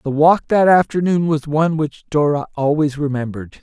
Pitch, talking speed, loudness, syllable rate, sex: 150 Hz, 165 wpm, -17 LUFS, 5.3 syllables/s, male